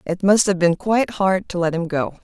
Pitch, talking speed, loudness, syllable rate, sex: 185 Hz, 270 wpm, -19 LUFS, 5.4 syllables/s, female